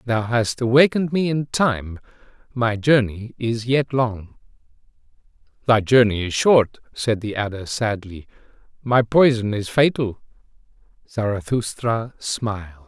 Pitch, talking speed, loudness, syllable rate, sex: 115 Hz, 115 wpm, -20 LUFS, 4.1 syllables/s, male